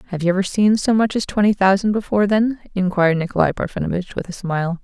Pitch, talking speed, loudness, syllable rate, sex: 195 Hz, 210 wpm, -19 LUFS, 6.8 syllables/s, female